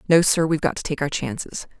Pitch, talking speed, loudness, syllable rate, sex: 155 Hz, 235 wpm, -22 LUFS, 6.5 syllables/s, female